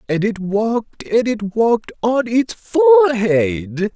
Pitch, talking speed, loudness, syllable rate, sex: 200 Hz, 135 wpm, -17 LUFS, 3.5 syllables/s, male